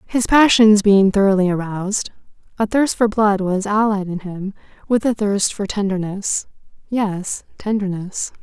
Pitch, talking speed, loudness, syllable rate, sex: 200 Hz, 135 wpm, -18 LUFS, 4.3 syllables/s, female